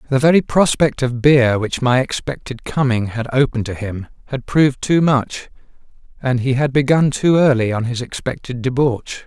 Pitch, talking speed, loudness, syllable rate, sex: 130 Hz, 175 wpm, -17 LUFS, 5.0 syllables/s, male